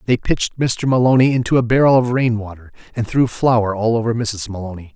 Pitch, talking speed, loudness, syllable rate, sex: 115 Hz, 205 wpm, -17 LUFS, 5.8 syllables/s, male